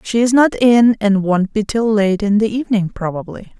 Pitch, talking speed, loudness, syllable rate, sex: 210 Hz, 215 wpm, -15 LUFS, 5.0 syllables/s, female